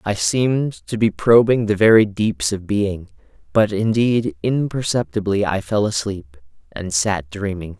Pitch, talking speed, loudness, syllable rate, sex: 100 Hz, 145 wpm, -18 LUFS, 4.2 syllables/s, male